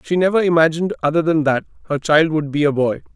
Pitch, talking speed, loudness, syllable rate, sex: 155 Hz, 230 wpm, -17 LUFS, 6.6 syllables/s, male